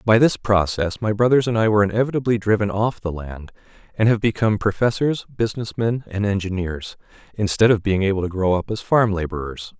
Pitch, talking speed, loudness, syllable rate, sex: 105 Hz, 190 wpm, -20 LUFS, 5.9 syllables/s, male